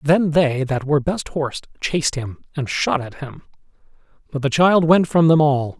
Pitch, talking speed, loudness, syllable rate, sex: 145 Hz, 195 wpm, -19 LUFS, 4.8 syllables/s, male